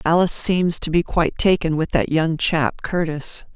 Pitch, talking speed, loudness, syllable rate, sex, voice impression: 160 Hz, 185 wpm, -19 LUFS, 4.7 syllables/s, female, feminine, adult-like, slightly intellectual, calm, slightly elegant